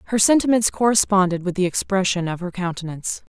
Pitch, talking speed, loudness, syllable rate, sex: 190 Hz, 160 wpm, -20 LUFS, 6.3 syllables/s, female